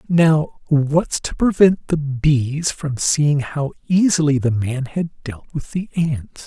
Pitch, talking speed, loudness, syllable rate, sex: 150 Hz, 160 wpm, -19 LUFS, 3.4 syllables/s, male